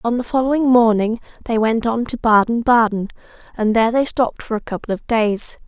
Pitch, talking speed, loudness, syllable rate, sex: 230 Hz, 200 wpm, -17 LUFS, 5.7 syllables/s, female